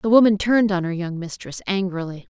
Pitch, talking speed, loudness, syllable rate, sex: 190 Hz, 205 wpm, -21 LUFS, 5.9 syllables/s, female